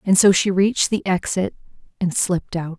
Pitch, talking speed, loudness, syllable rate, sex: 185 Hz, 195 wpm, -19 LUFS, 5.4 syllables/s, female